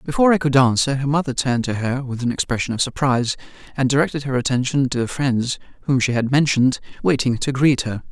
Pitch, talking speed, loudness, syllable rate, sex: 130 Hz, 215 wpm, -19 LUFS, 6.4 syllables/s, male